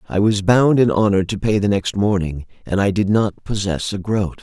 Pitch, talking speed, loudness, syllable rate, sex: 100 Hz, 230 wpm, -18 LUFS, 5.1 syllables/s, male